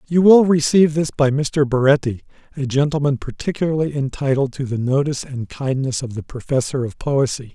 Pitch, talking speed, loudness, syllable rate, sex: 140 Hz, 165 wpm, -19 LUFS, 5.5 syllables/s, male